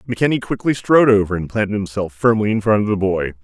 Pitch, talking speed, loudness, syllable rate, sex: 105 Hz, 225 wpm, -17 LUFS, 6.9 syllables/s, male